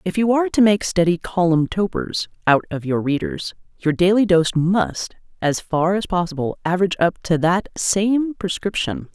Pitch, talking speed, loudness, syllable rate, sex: 175 Hz, 170 wpm, -19 LUFS, 4.8 syllables/s, female